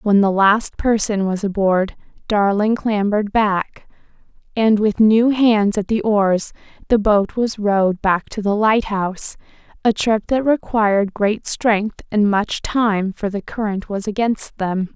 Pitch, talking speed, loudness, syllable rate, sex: 210 Hz, 150 wpm, -18 LUFS, 3.9 syllables/s, female